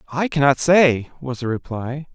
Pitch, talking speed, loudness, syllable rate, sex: 140 Hz, 170 wpm, -19 LUFS, 4.5 syllables/s, male